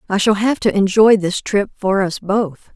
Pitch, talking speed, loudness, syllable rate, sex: 200 Hz, 220 wpm, -16 LUFS, 4.4 syllables/s, female